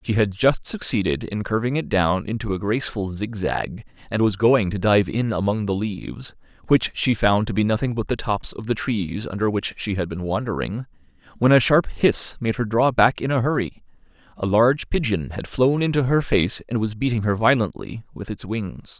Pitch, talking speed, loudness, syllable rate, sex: 110 Hz, 210 wpm, -22 LUFS, 5.1 syllables/s, male